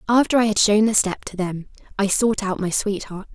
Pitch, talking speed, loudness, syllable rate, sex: 205 Hz, 235 wpm, -20 LUFS, 5.3 syllables/s, female